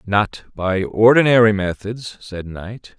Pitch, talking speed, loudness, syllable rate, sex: 105 Hz, 120 wpm, -16 LUFS, 3.7 syllables/s, male